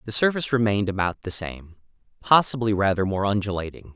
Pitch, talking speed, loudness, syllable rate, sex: 105 Hz, 150 wpm, -23 LUFS, 6.3 syllables/s, male